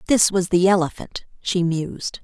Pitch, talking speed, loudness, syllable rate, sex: 180 Hz, 160 wpm, -20 LUFS, 4.7 syllables/s, female